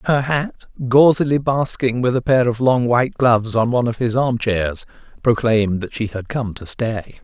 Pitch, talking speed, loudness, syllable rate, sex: 120 Hz, 200 wpm, -18 LUFS, 4.9 syllables/s, male